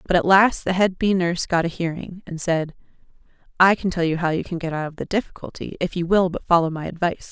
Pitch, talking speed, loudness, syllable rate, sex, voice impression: 175 Hz, 245 wpm, -21 LUFS, 6.2 syllables/s, female, very feminine, very adult-like, very middle-aged, slightly thin, slightly relaxed, slightly powerful, slightly bright, hard, clear, fluent, cool, intellectual, refreshing, very sincere, very calm, slightly friendly, very reassuring, slightly unique, elegant, slightly wild, slightly sweet, kind, sharp, slightly modest